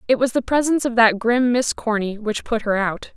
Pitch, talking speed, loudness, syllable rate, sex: 230 Hz, 245 wpm, -19 LUFS, 5.4 syllables/s, female